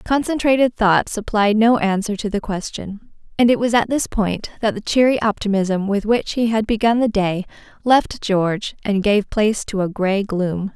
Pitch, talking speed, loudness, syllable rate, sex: 210 Hz, 190 wpm, -18 LUFS, 4.7 syllables/s, female